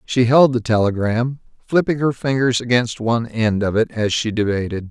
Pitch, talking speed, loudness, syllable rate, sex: 120 Hz, 185 wpm, -18 LUFS, 5.0 syllables/s, male